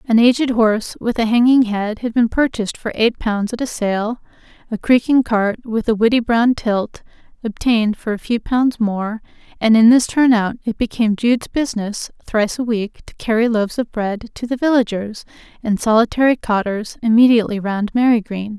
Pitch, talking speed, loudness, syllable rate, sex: 225 Hz, 180 wpm, -17 LUFS, 5.2 syllables/s, female